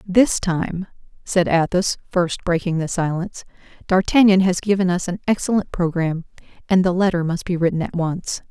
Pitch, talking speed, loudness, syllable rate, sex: 180 Hz, 160 wpm, -20 LUFS, 5.1 syllables/s, female